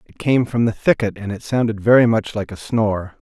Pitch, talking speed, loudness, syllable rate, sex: 110 Hz, 240 wpm, -18 LUFS, 5.5 syllables/s, male